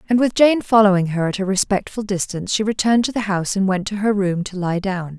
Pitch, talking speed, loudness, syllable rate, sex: 200 Hz, 255 wpm, -19 LUFS, 6.2 syllables/s, female